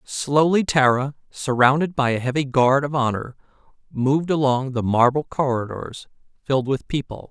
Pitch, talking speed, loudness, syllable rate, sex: 135 Hz, 140 wpm, -20 LUFS, 4.9 syllables/s, male